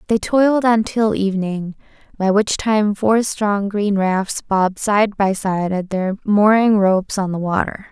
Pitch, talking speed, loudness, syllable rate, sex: 205 Hz, 175 wpm, -17 LUFS, 4.2 syllables/s, female